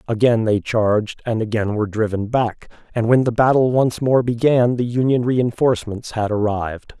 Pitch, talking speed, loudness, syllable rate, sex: 115 Hz, 170 wpm, -19 LUFS, 5.0 syllables/s, male